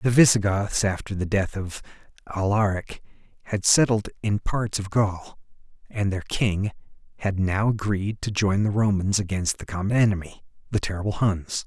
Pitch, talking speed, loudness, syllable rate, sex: 100 Hz, 150 wpm, -24 LUFS, 4.8 syllables/s, male